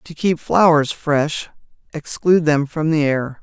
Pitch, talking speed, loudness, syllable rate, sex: 155 Hz, 160 wpm, -17 LUFS, 4.1 syllables/s, female